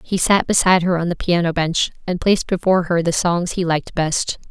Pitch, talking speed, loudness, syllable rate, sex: 175 Hz, 225 wpm, -18 LUFS, 5.8 syllables/s, female